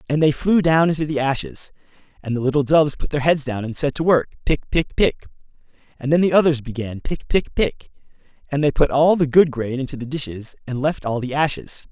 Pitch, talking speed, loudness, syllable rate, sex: 140 Hz, 225 wpm, -20 LUFS, 5.5 syllables/s, male